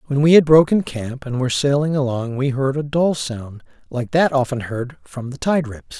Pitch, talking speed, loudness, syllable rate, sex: 135 Hz, 220 wpm, -18 LUFS, 5.0 syllables/s, male